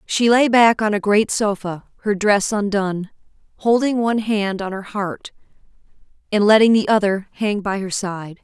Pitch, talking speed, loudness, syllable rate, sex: 205 Hz, 170 wpm, -18 LUFS, 4.7 syllables/s, female